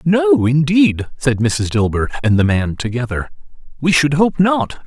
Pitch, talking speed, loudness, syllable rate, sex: 135 Hz, 160 wpm, -16 LUFS, 4.2 syllables/s, male